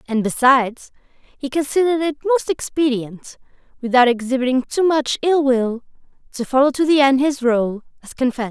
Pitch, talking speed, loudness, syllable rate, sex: 265 Hz, 155 wpm, -18 LUFS, 5.2 syllables/s, female